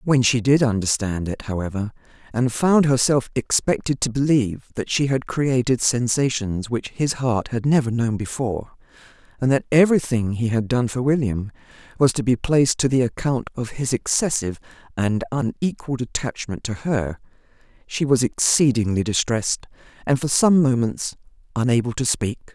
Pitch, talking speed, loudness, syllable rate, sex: 125 Hz, 155 wpm, -21 LUFS, 5.1 syllables/s, female